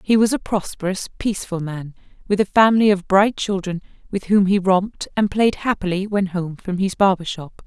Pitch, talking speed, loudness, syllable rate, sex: 195 Hz, 195 wpm, -19 LUFS, 5.3 syllables/s, female